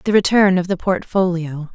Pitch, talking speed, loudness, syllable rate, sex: 185 Hz, 170 wpm, -17 LUFS, 5.0 syllables/s, female